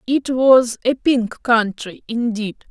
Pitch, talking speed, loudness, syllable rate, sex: 235 Hz, 135 wpm, -17 LUFS, 3.4 syllables/s, female